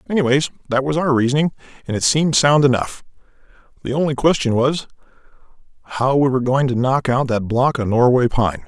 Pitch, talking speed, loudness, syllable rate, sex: 130 Hz, 180 wpm, -17 LUFS, 6.1 syllables/s, male